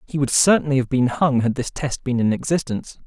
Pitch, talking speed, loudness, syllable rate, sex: 135 Hz, 235 wpm, -20 LUFS, 6.0 syllables/s, male